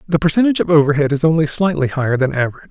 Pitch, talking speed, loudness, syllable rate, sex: 155 Hz, 220 wpm, -15 LUFS, 8.2 syllables/s, male